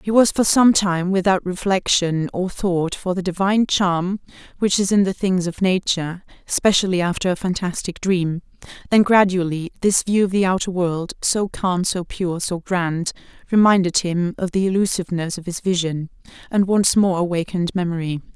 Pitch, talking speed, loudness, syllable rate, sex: 185 Hz, 170 wpm, -19 LUFS, 4.9 syllables/s, female